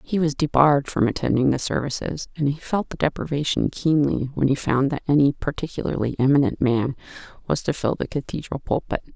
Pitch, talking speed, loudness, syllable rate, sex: 140 Hz, 175 wpm, -22 LUFS, 5.8 syllables/s, female